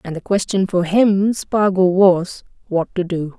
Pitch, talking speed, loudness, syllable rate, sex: 190 Hz, 160 wpm, -17 LUFS, 4.0 syllables/s, female